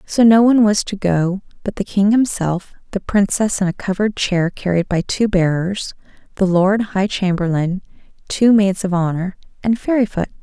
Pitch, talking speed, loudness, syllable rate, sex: 195 Hz, 175 wpm, -17 LUFS, 4.9 syllables/s, female